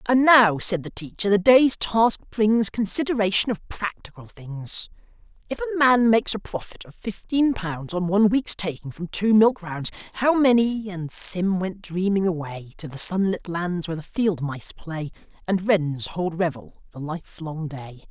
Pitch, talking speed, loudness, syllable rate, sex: 195 Hz, 175 wpm, -22 LUFS, 4.5 syllables/s, male